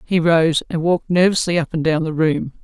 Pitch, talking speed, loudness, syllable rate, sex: 165 Hz, 230 wpm, -17 LUFS, 5.5 syllables/s, female